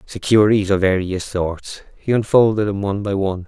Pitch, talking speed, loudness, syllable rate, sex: 100 Hz, 175 wpm, -18 LUFS, 5.6 syllables/s, male